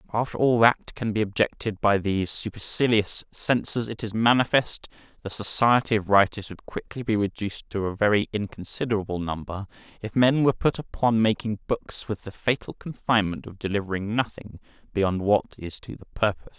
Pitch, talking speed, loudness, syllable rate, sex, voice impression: 105 Hz, 170 wpm, -25 LUFS, 5.5 syllables/s, male, masculine, adult-like, slightly thin, slightly weak, slightly bright, slightly halting, intellectual, slightly friendly, unique, slightly intense, slightly modest